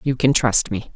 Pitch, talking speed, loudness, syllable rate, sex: 120 Hz, 250 wpm, -18 LUFS, 4.7 syllables/s, female